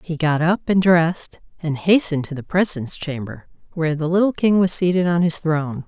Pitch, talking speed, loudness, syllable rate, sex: 165 Hz, 205 wpm, -19 LUFS, 5.7 syllables/s, female